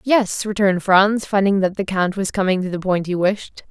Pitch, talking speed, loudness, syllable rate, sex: 195 Hz, 225 wpm, -18 LUFS, 5.0 syllables/s, female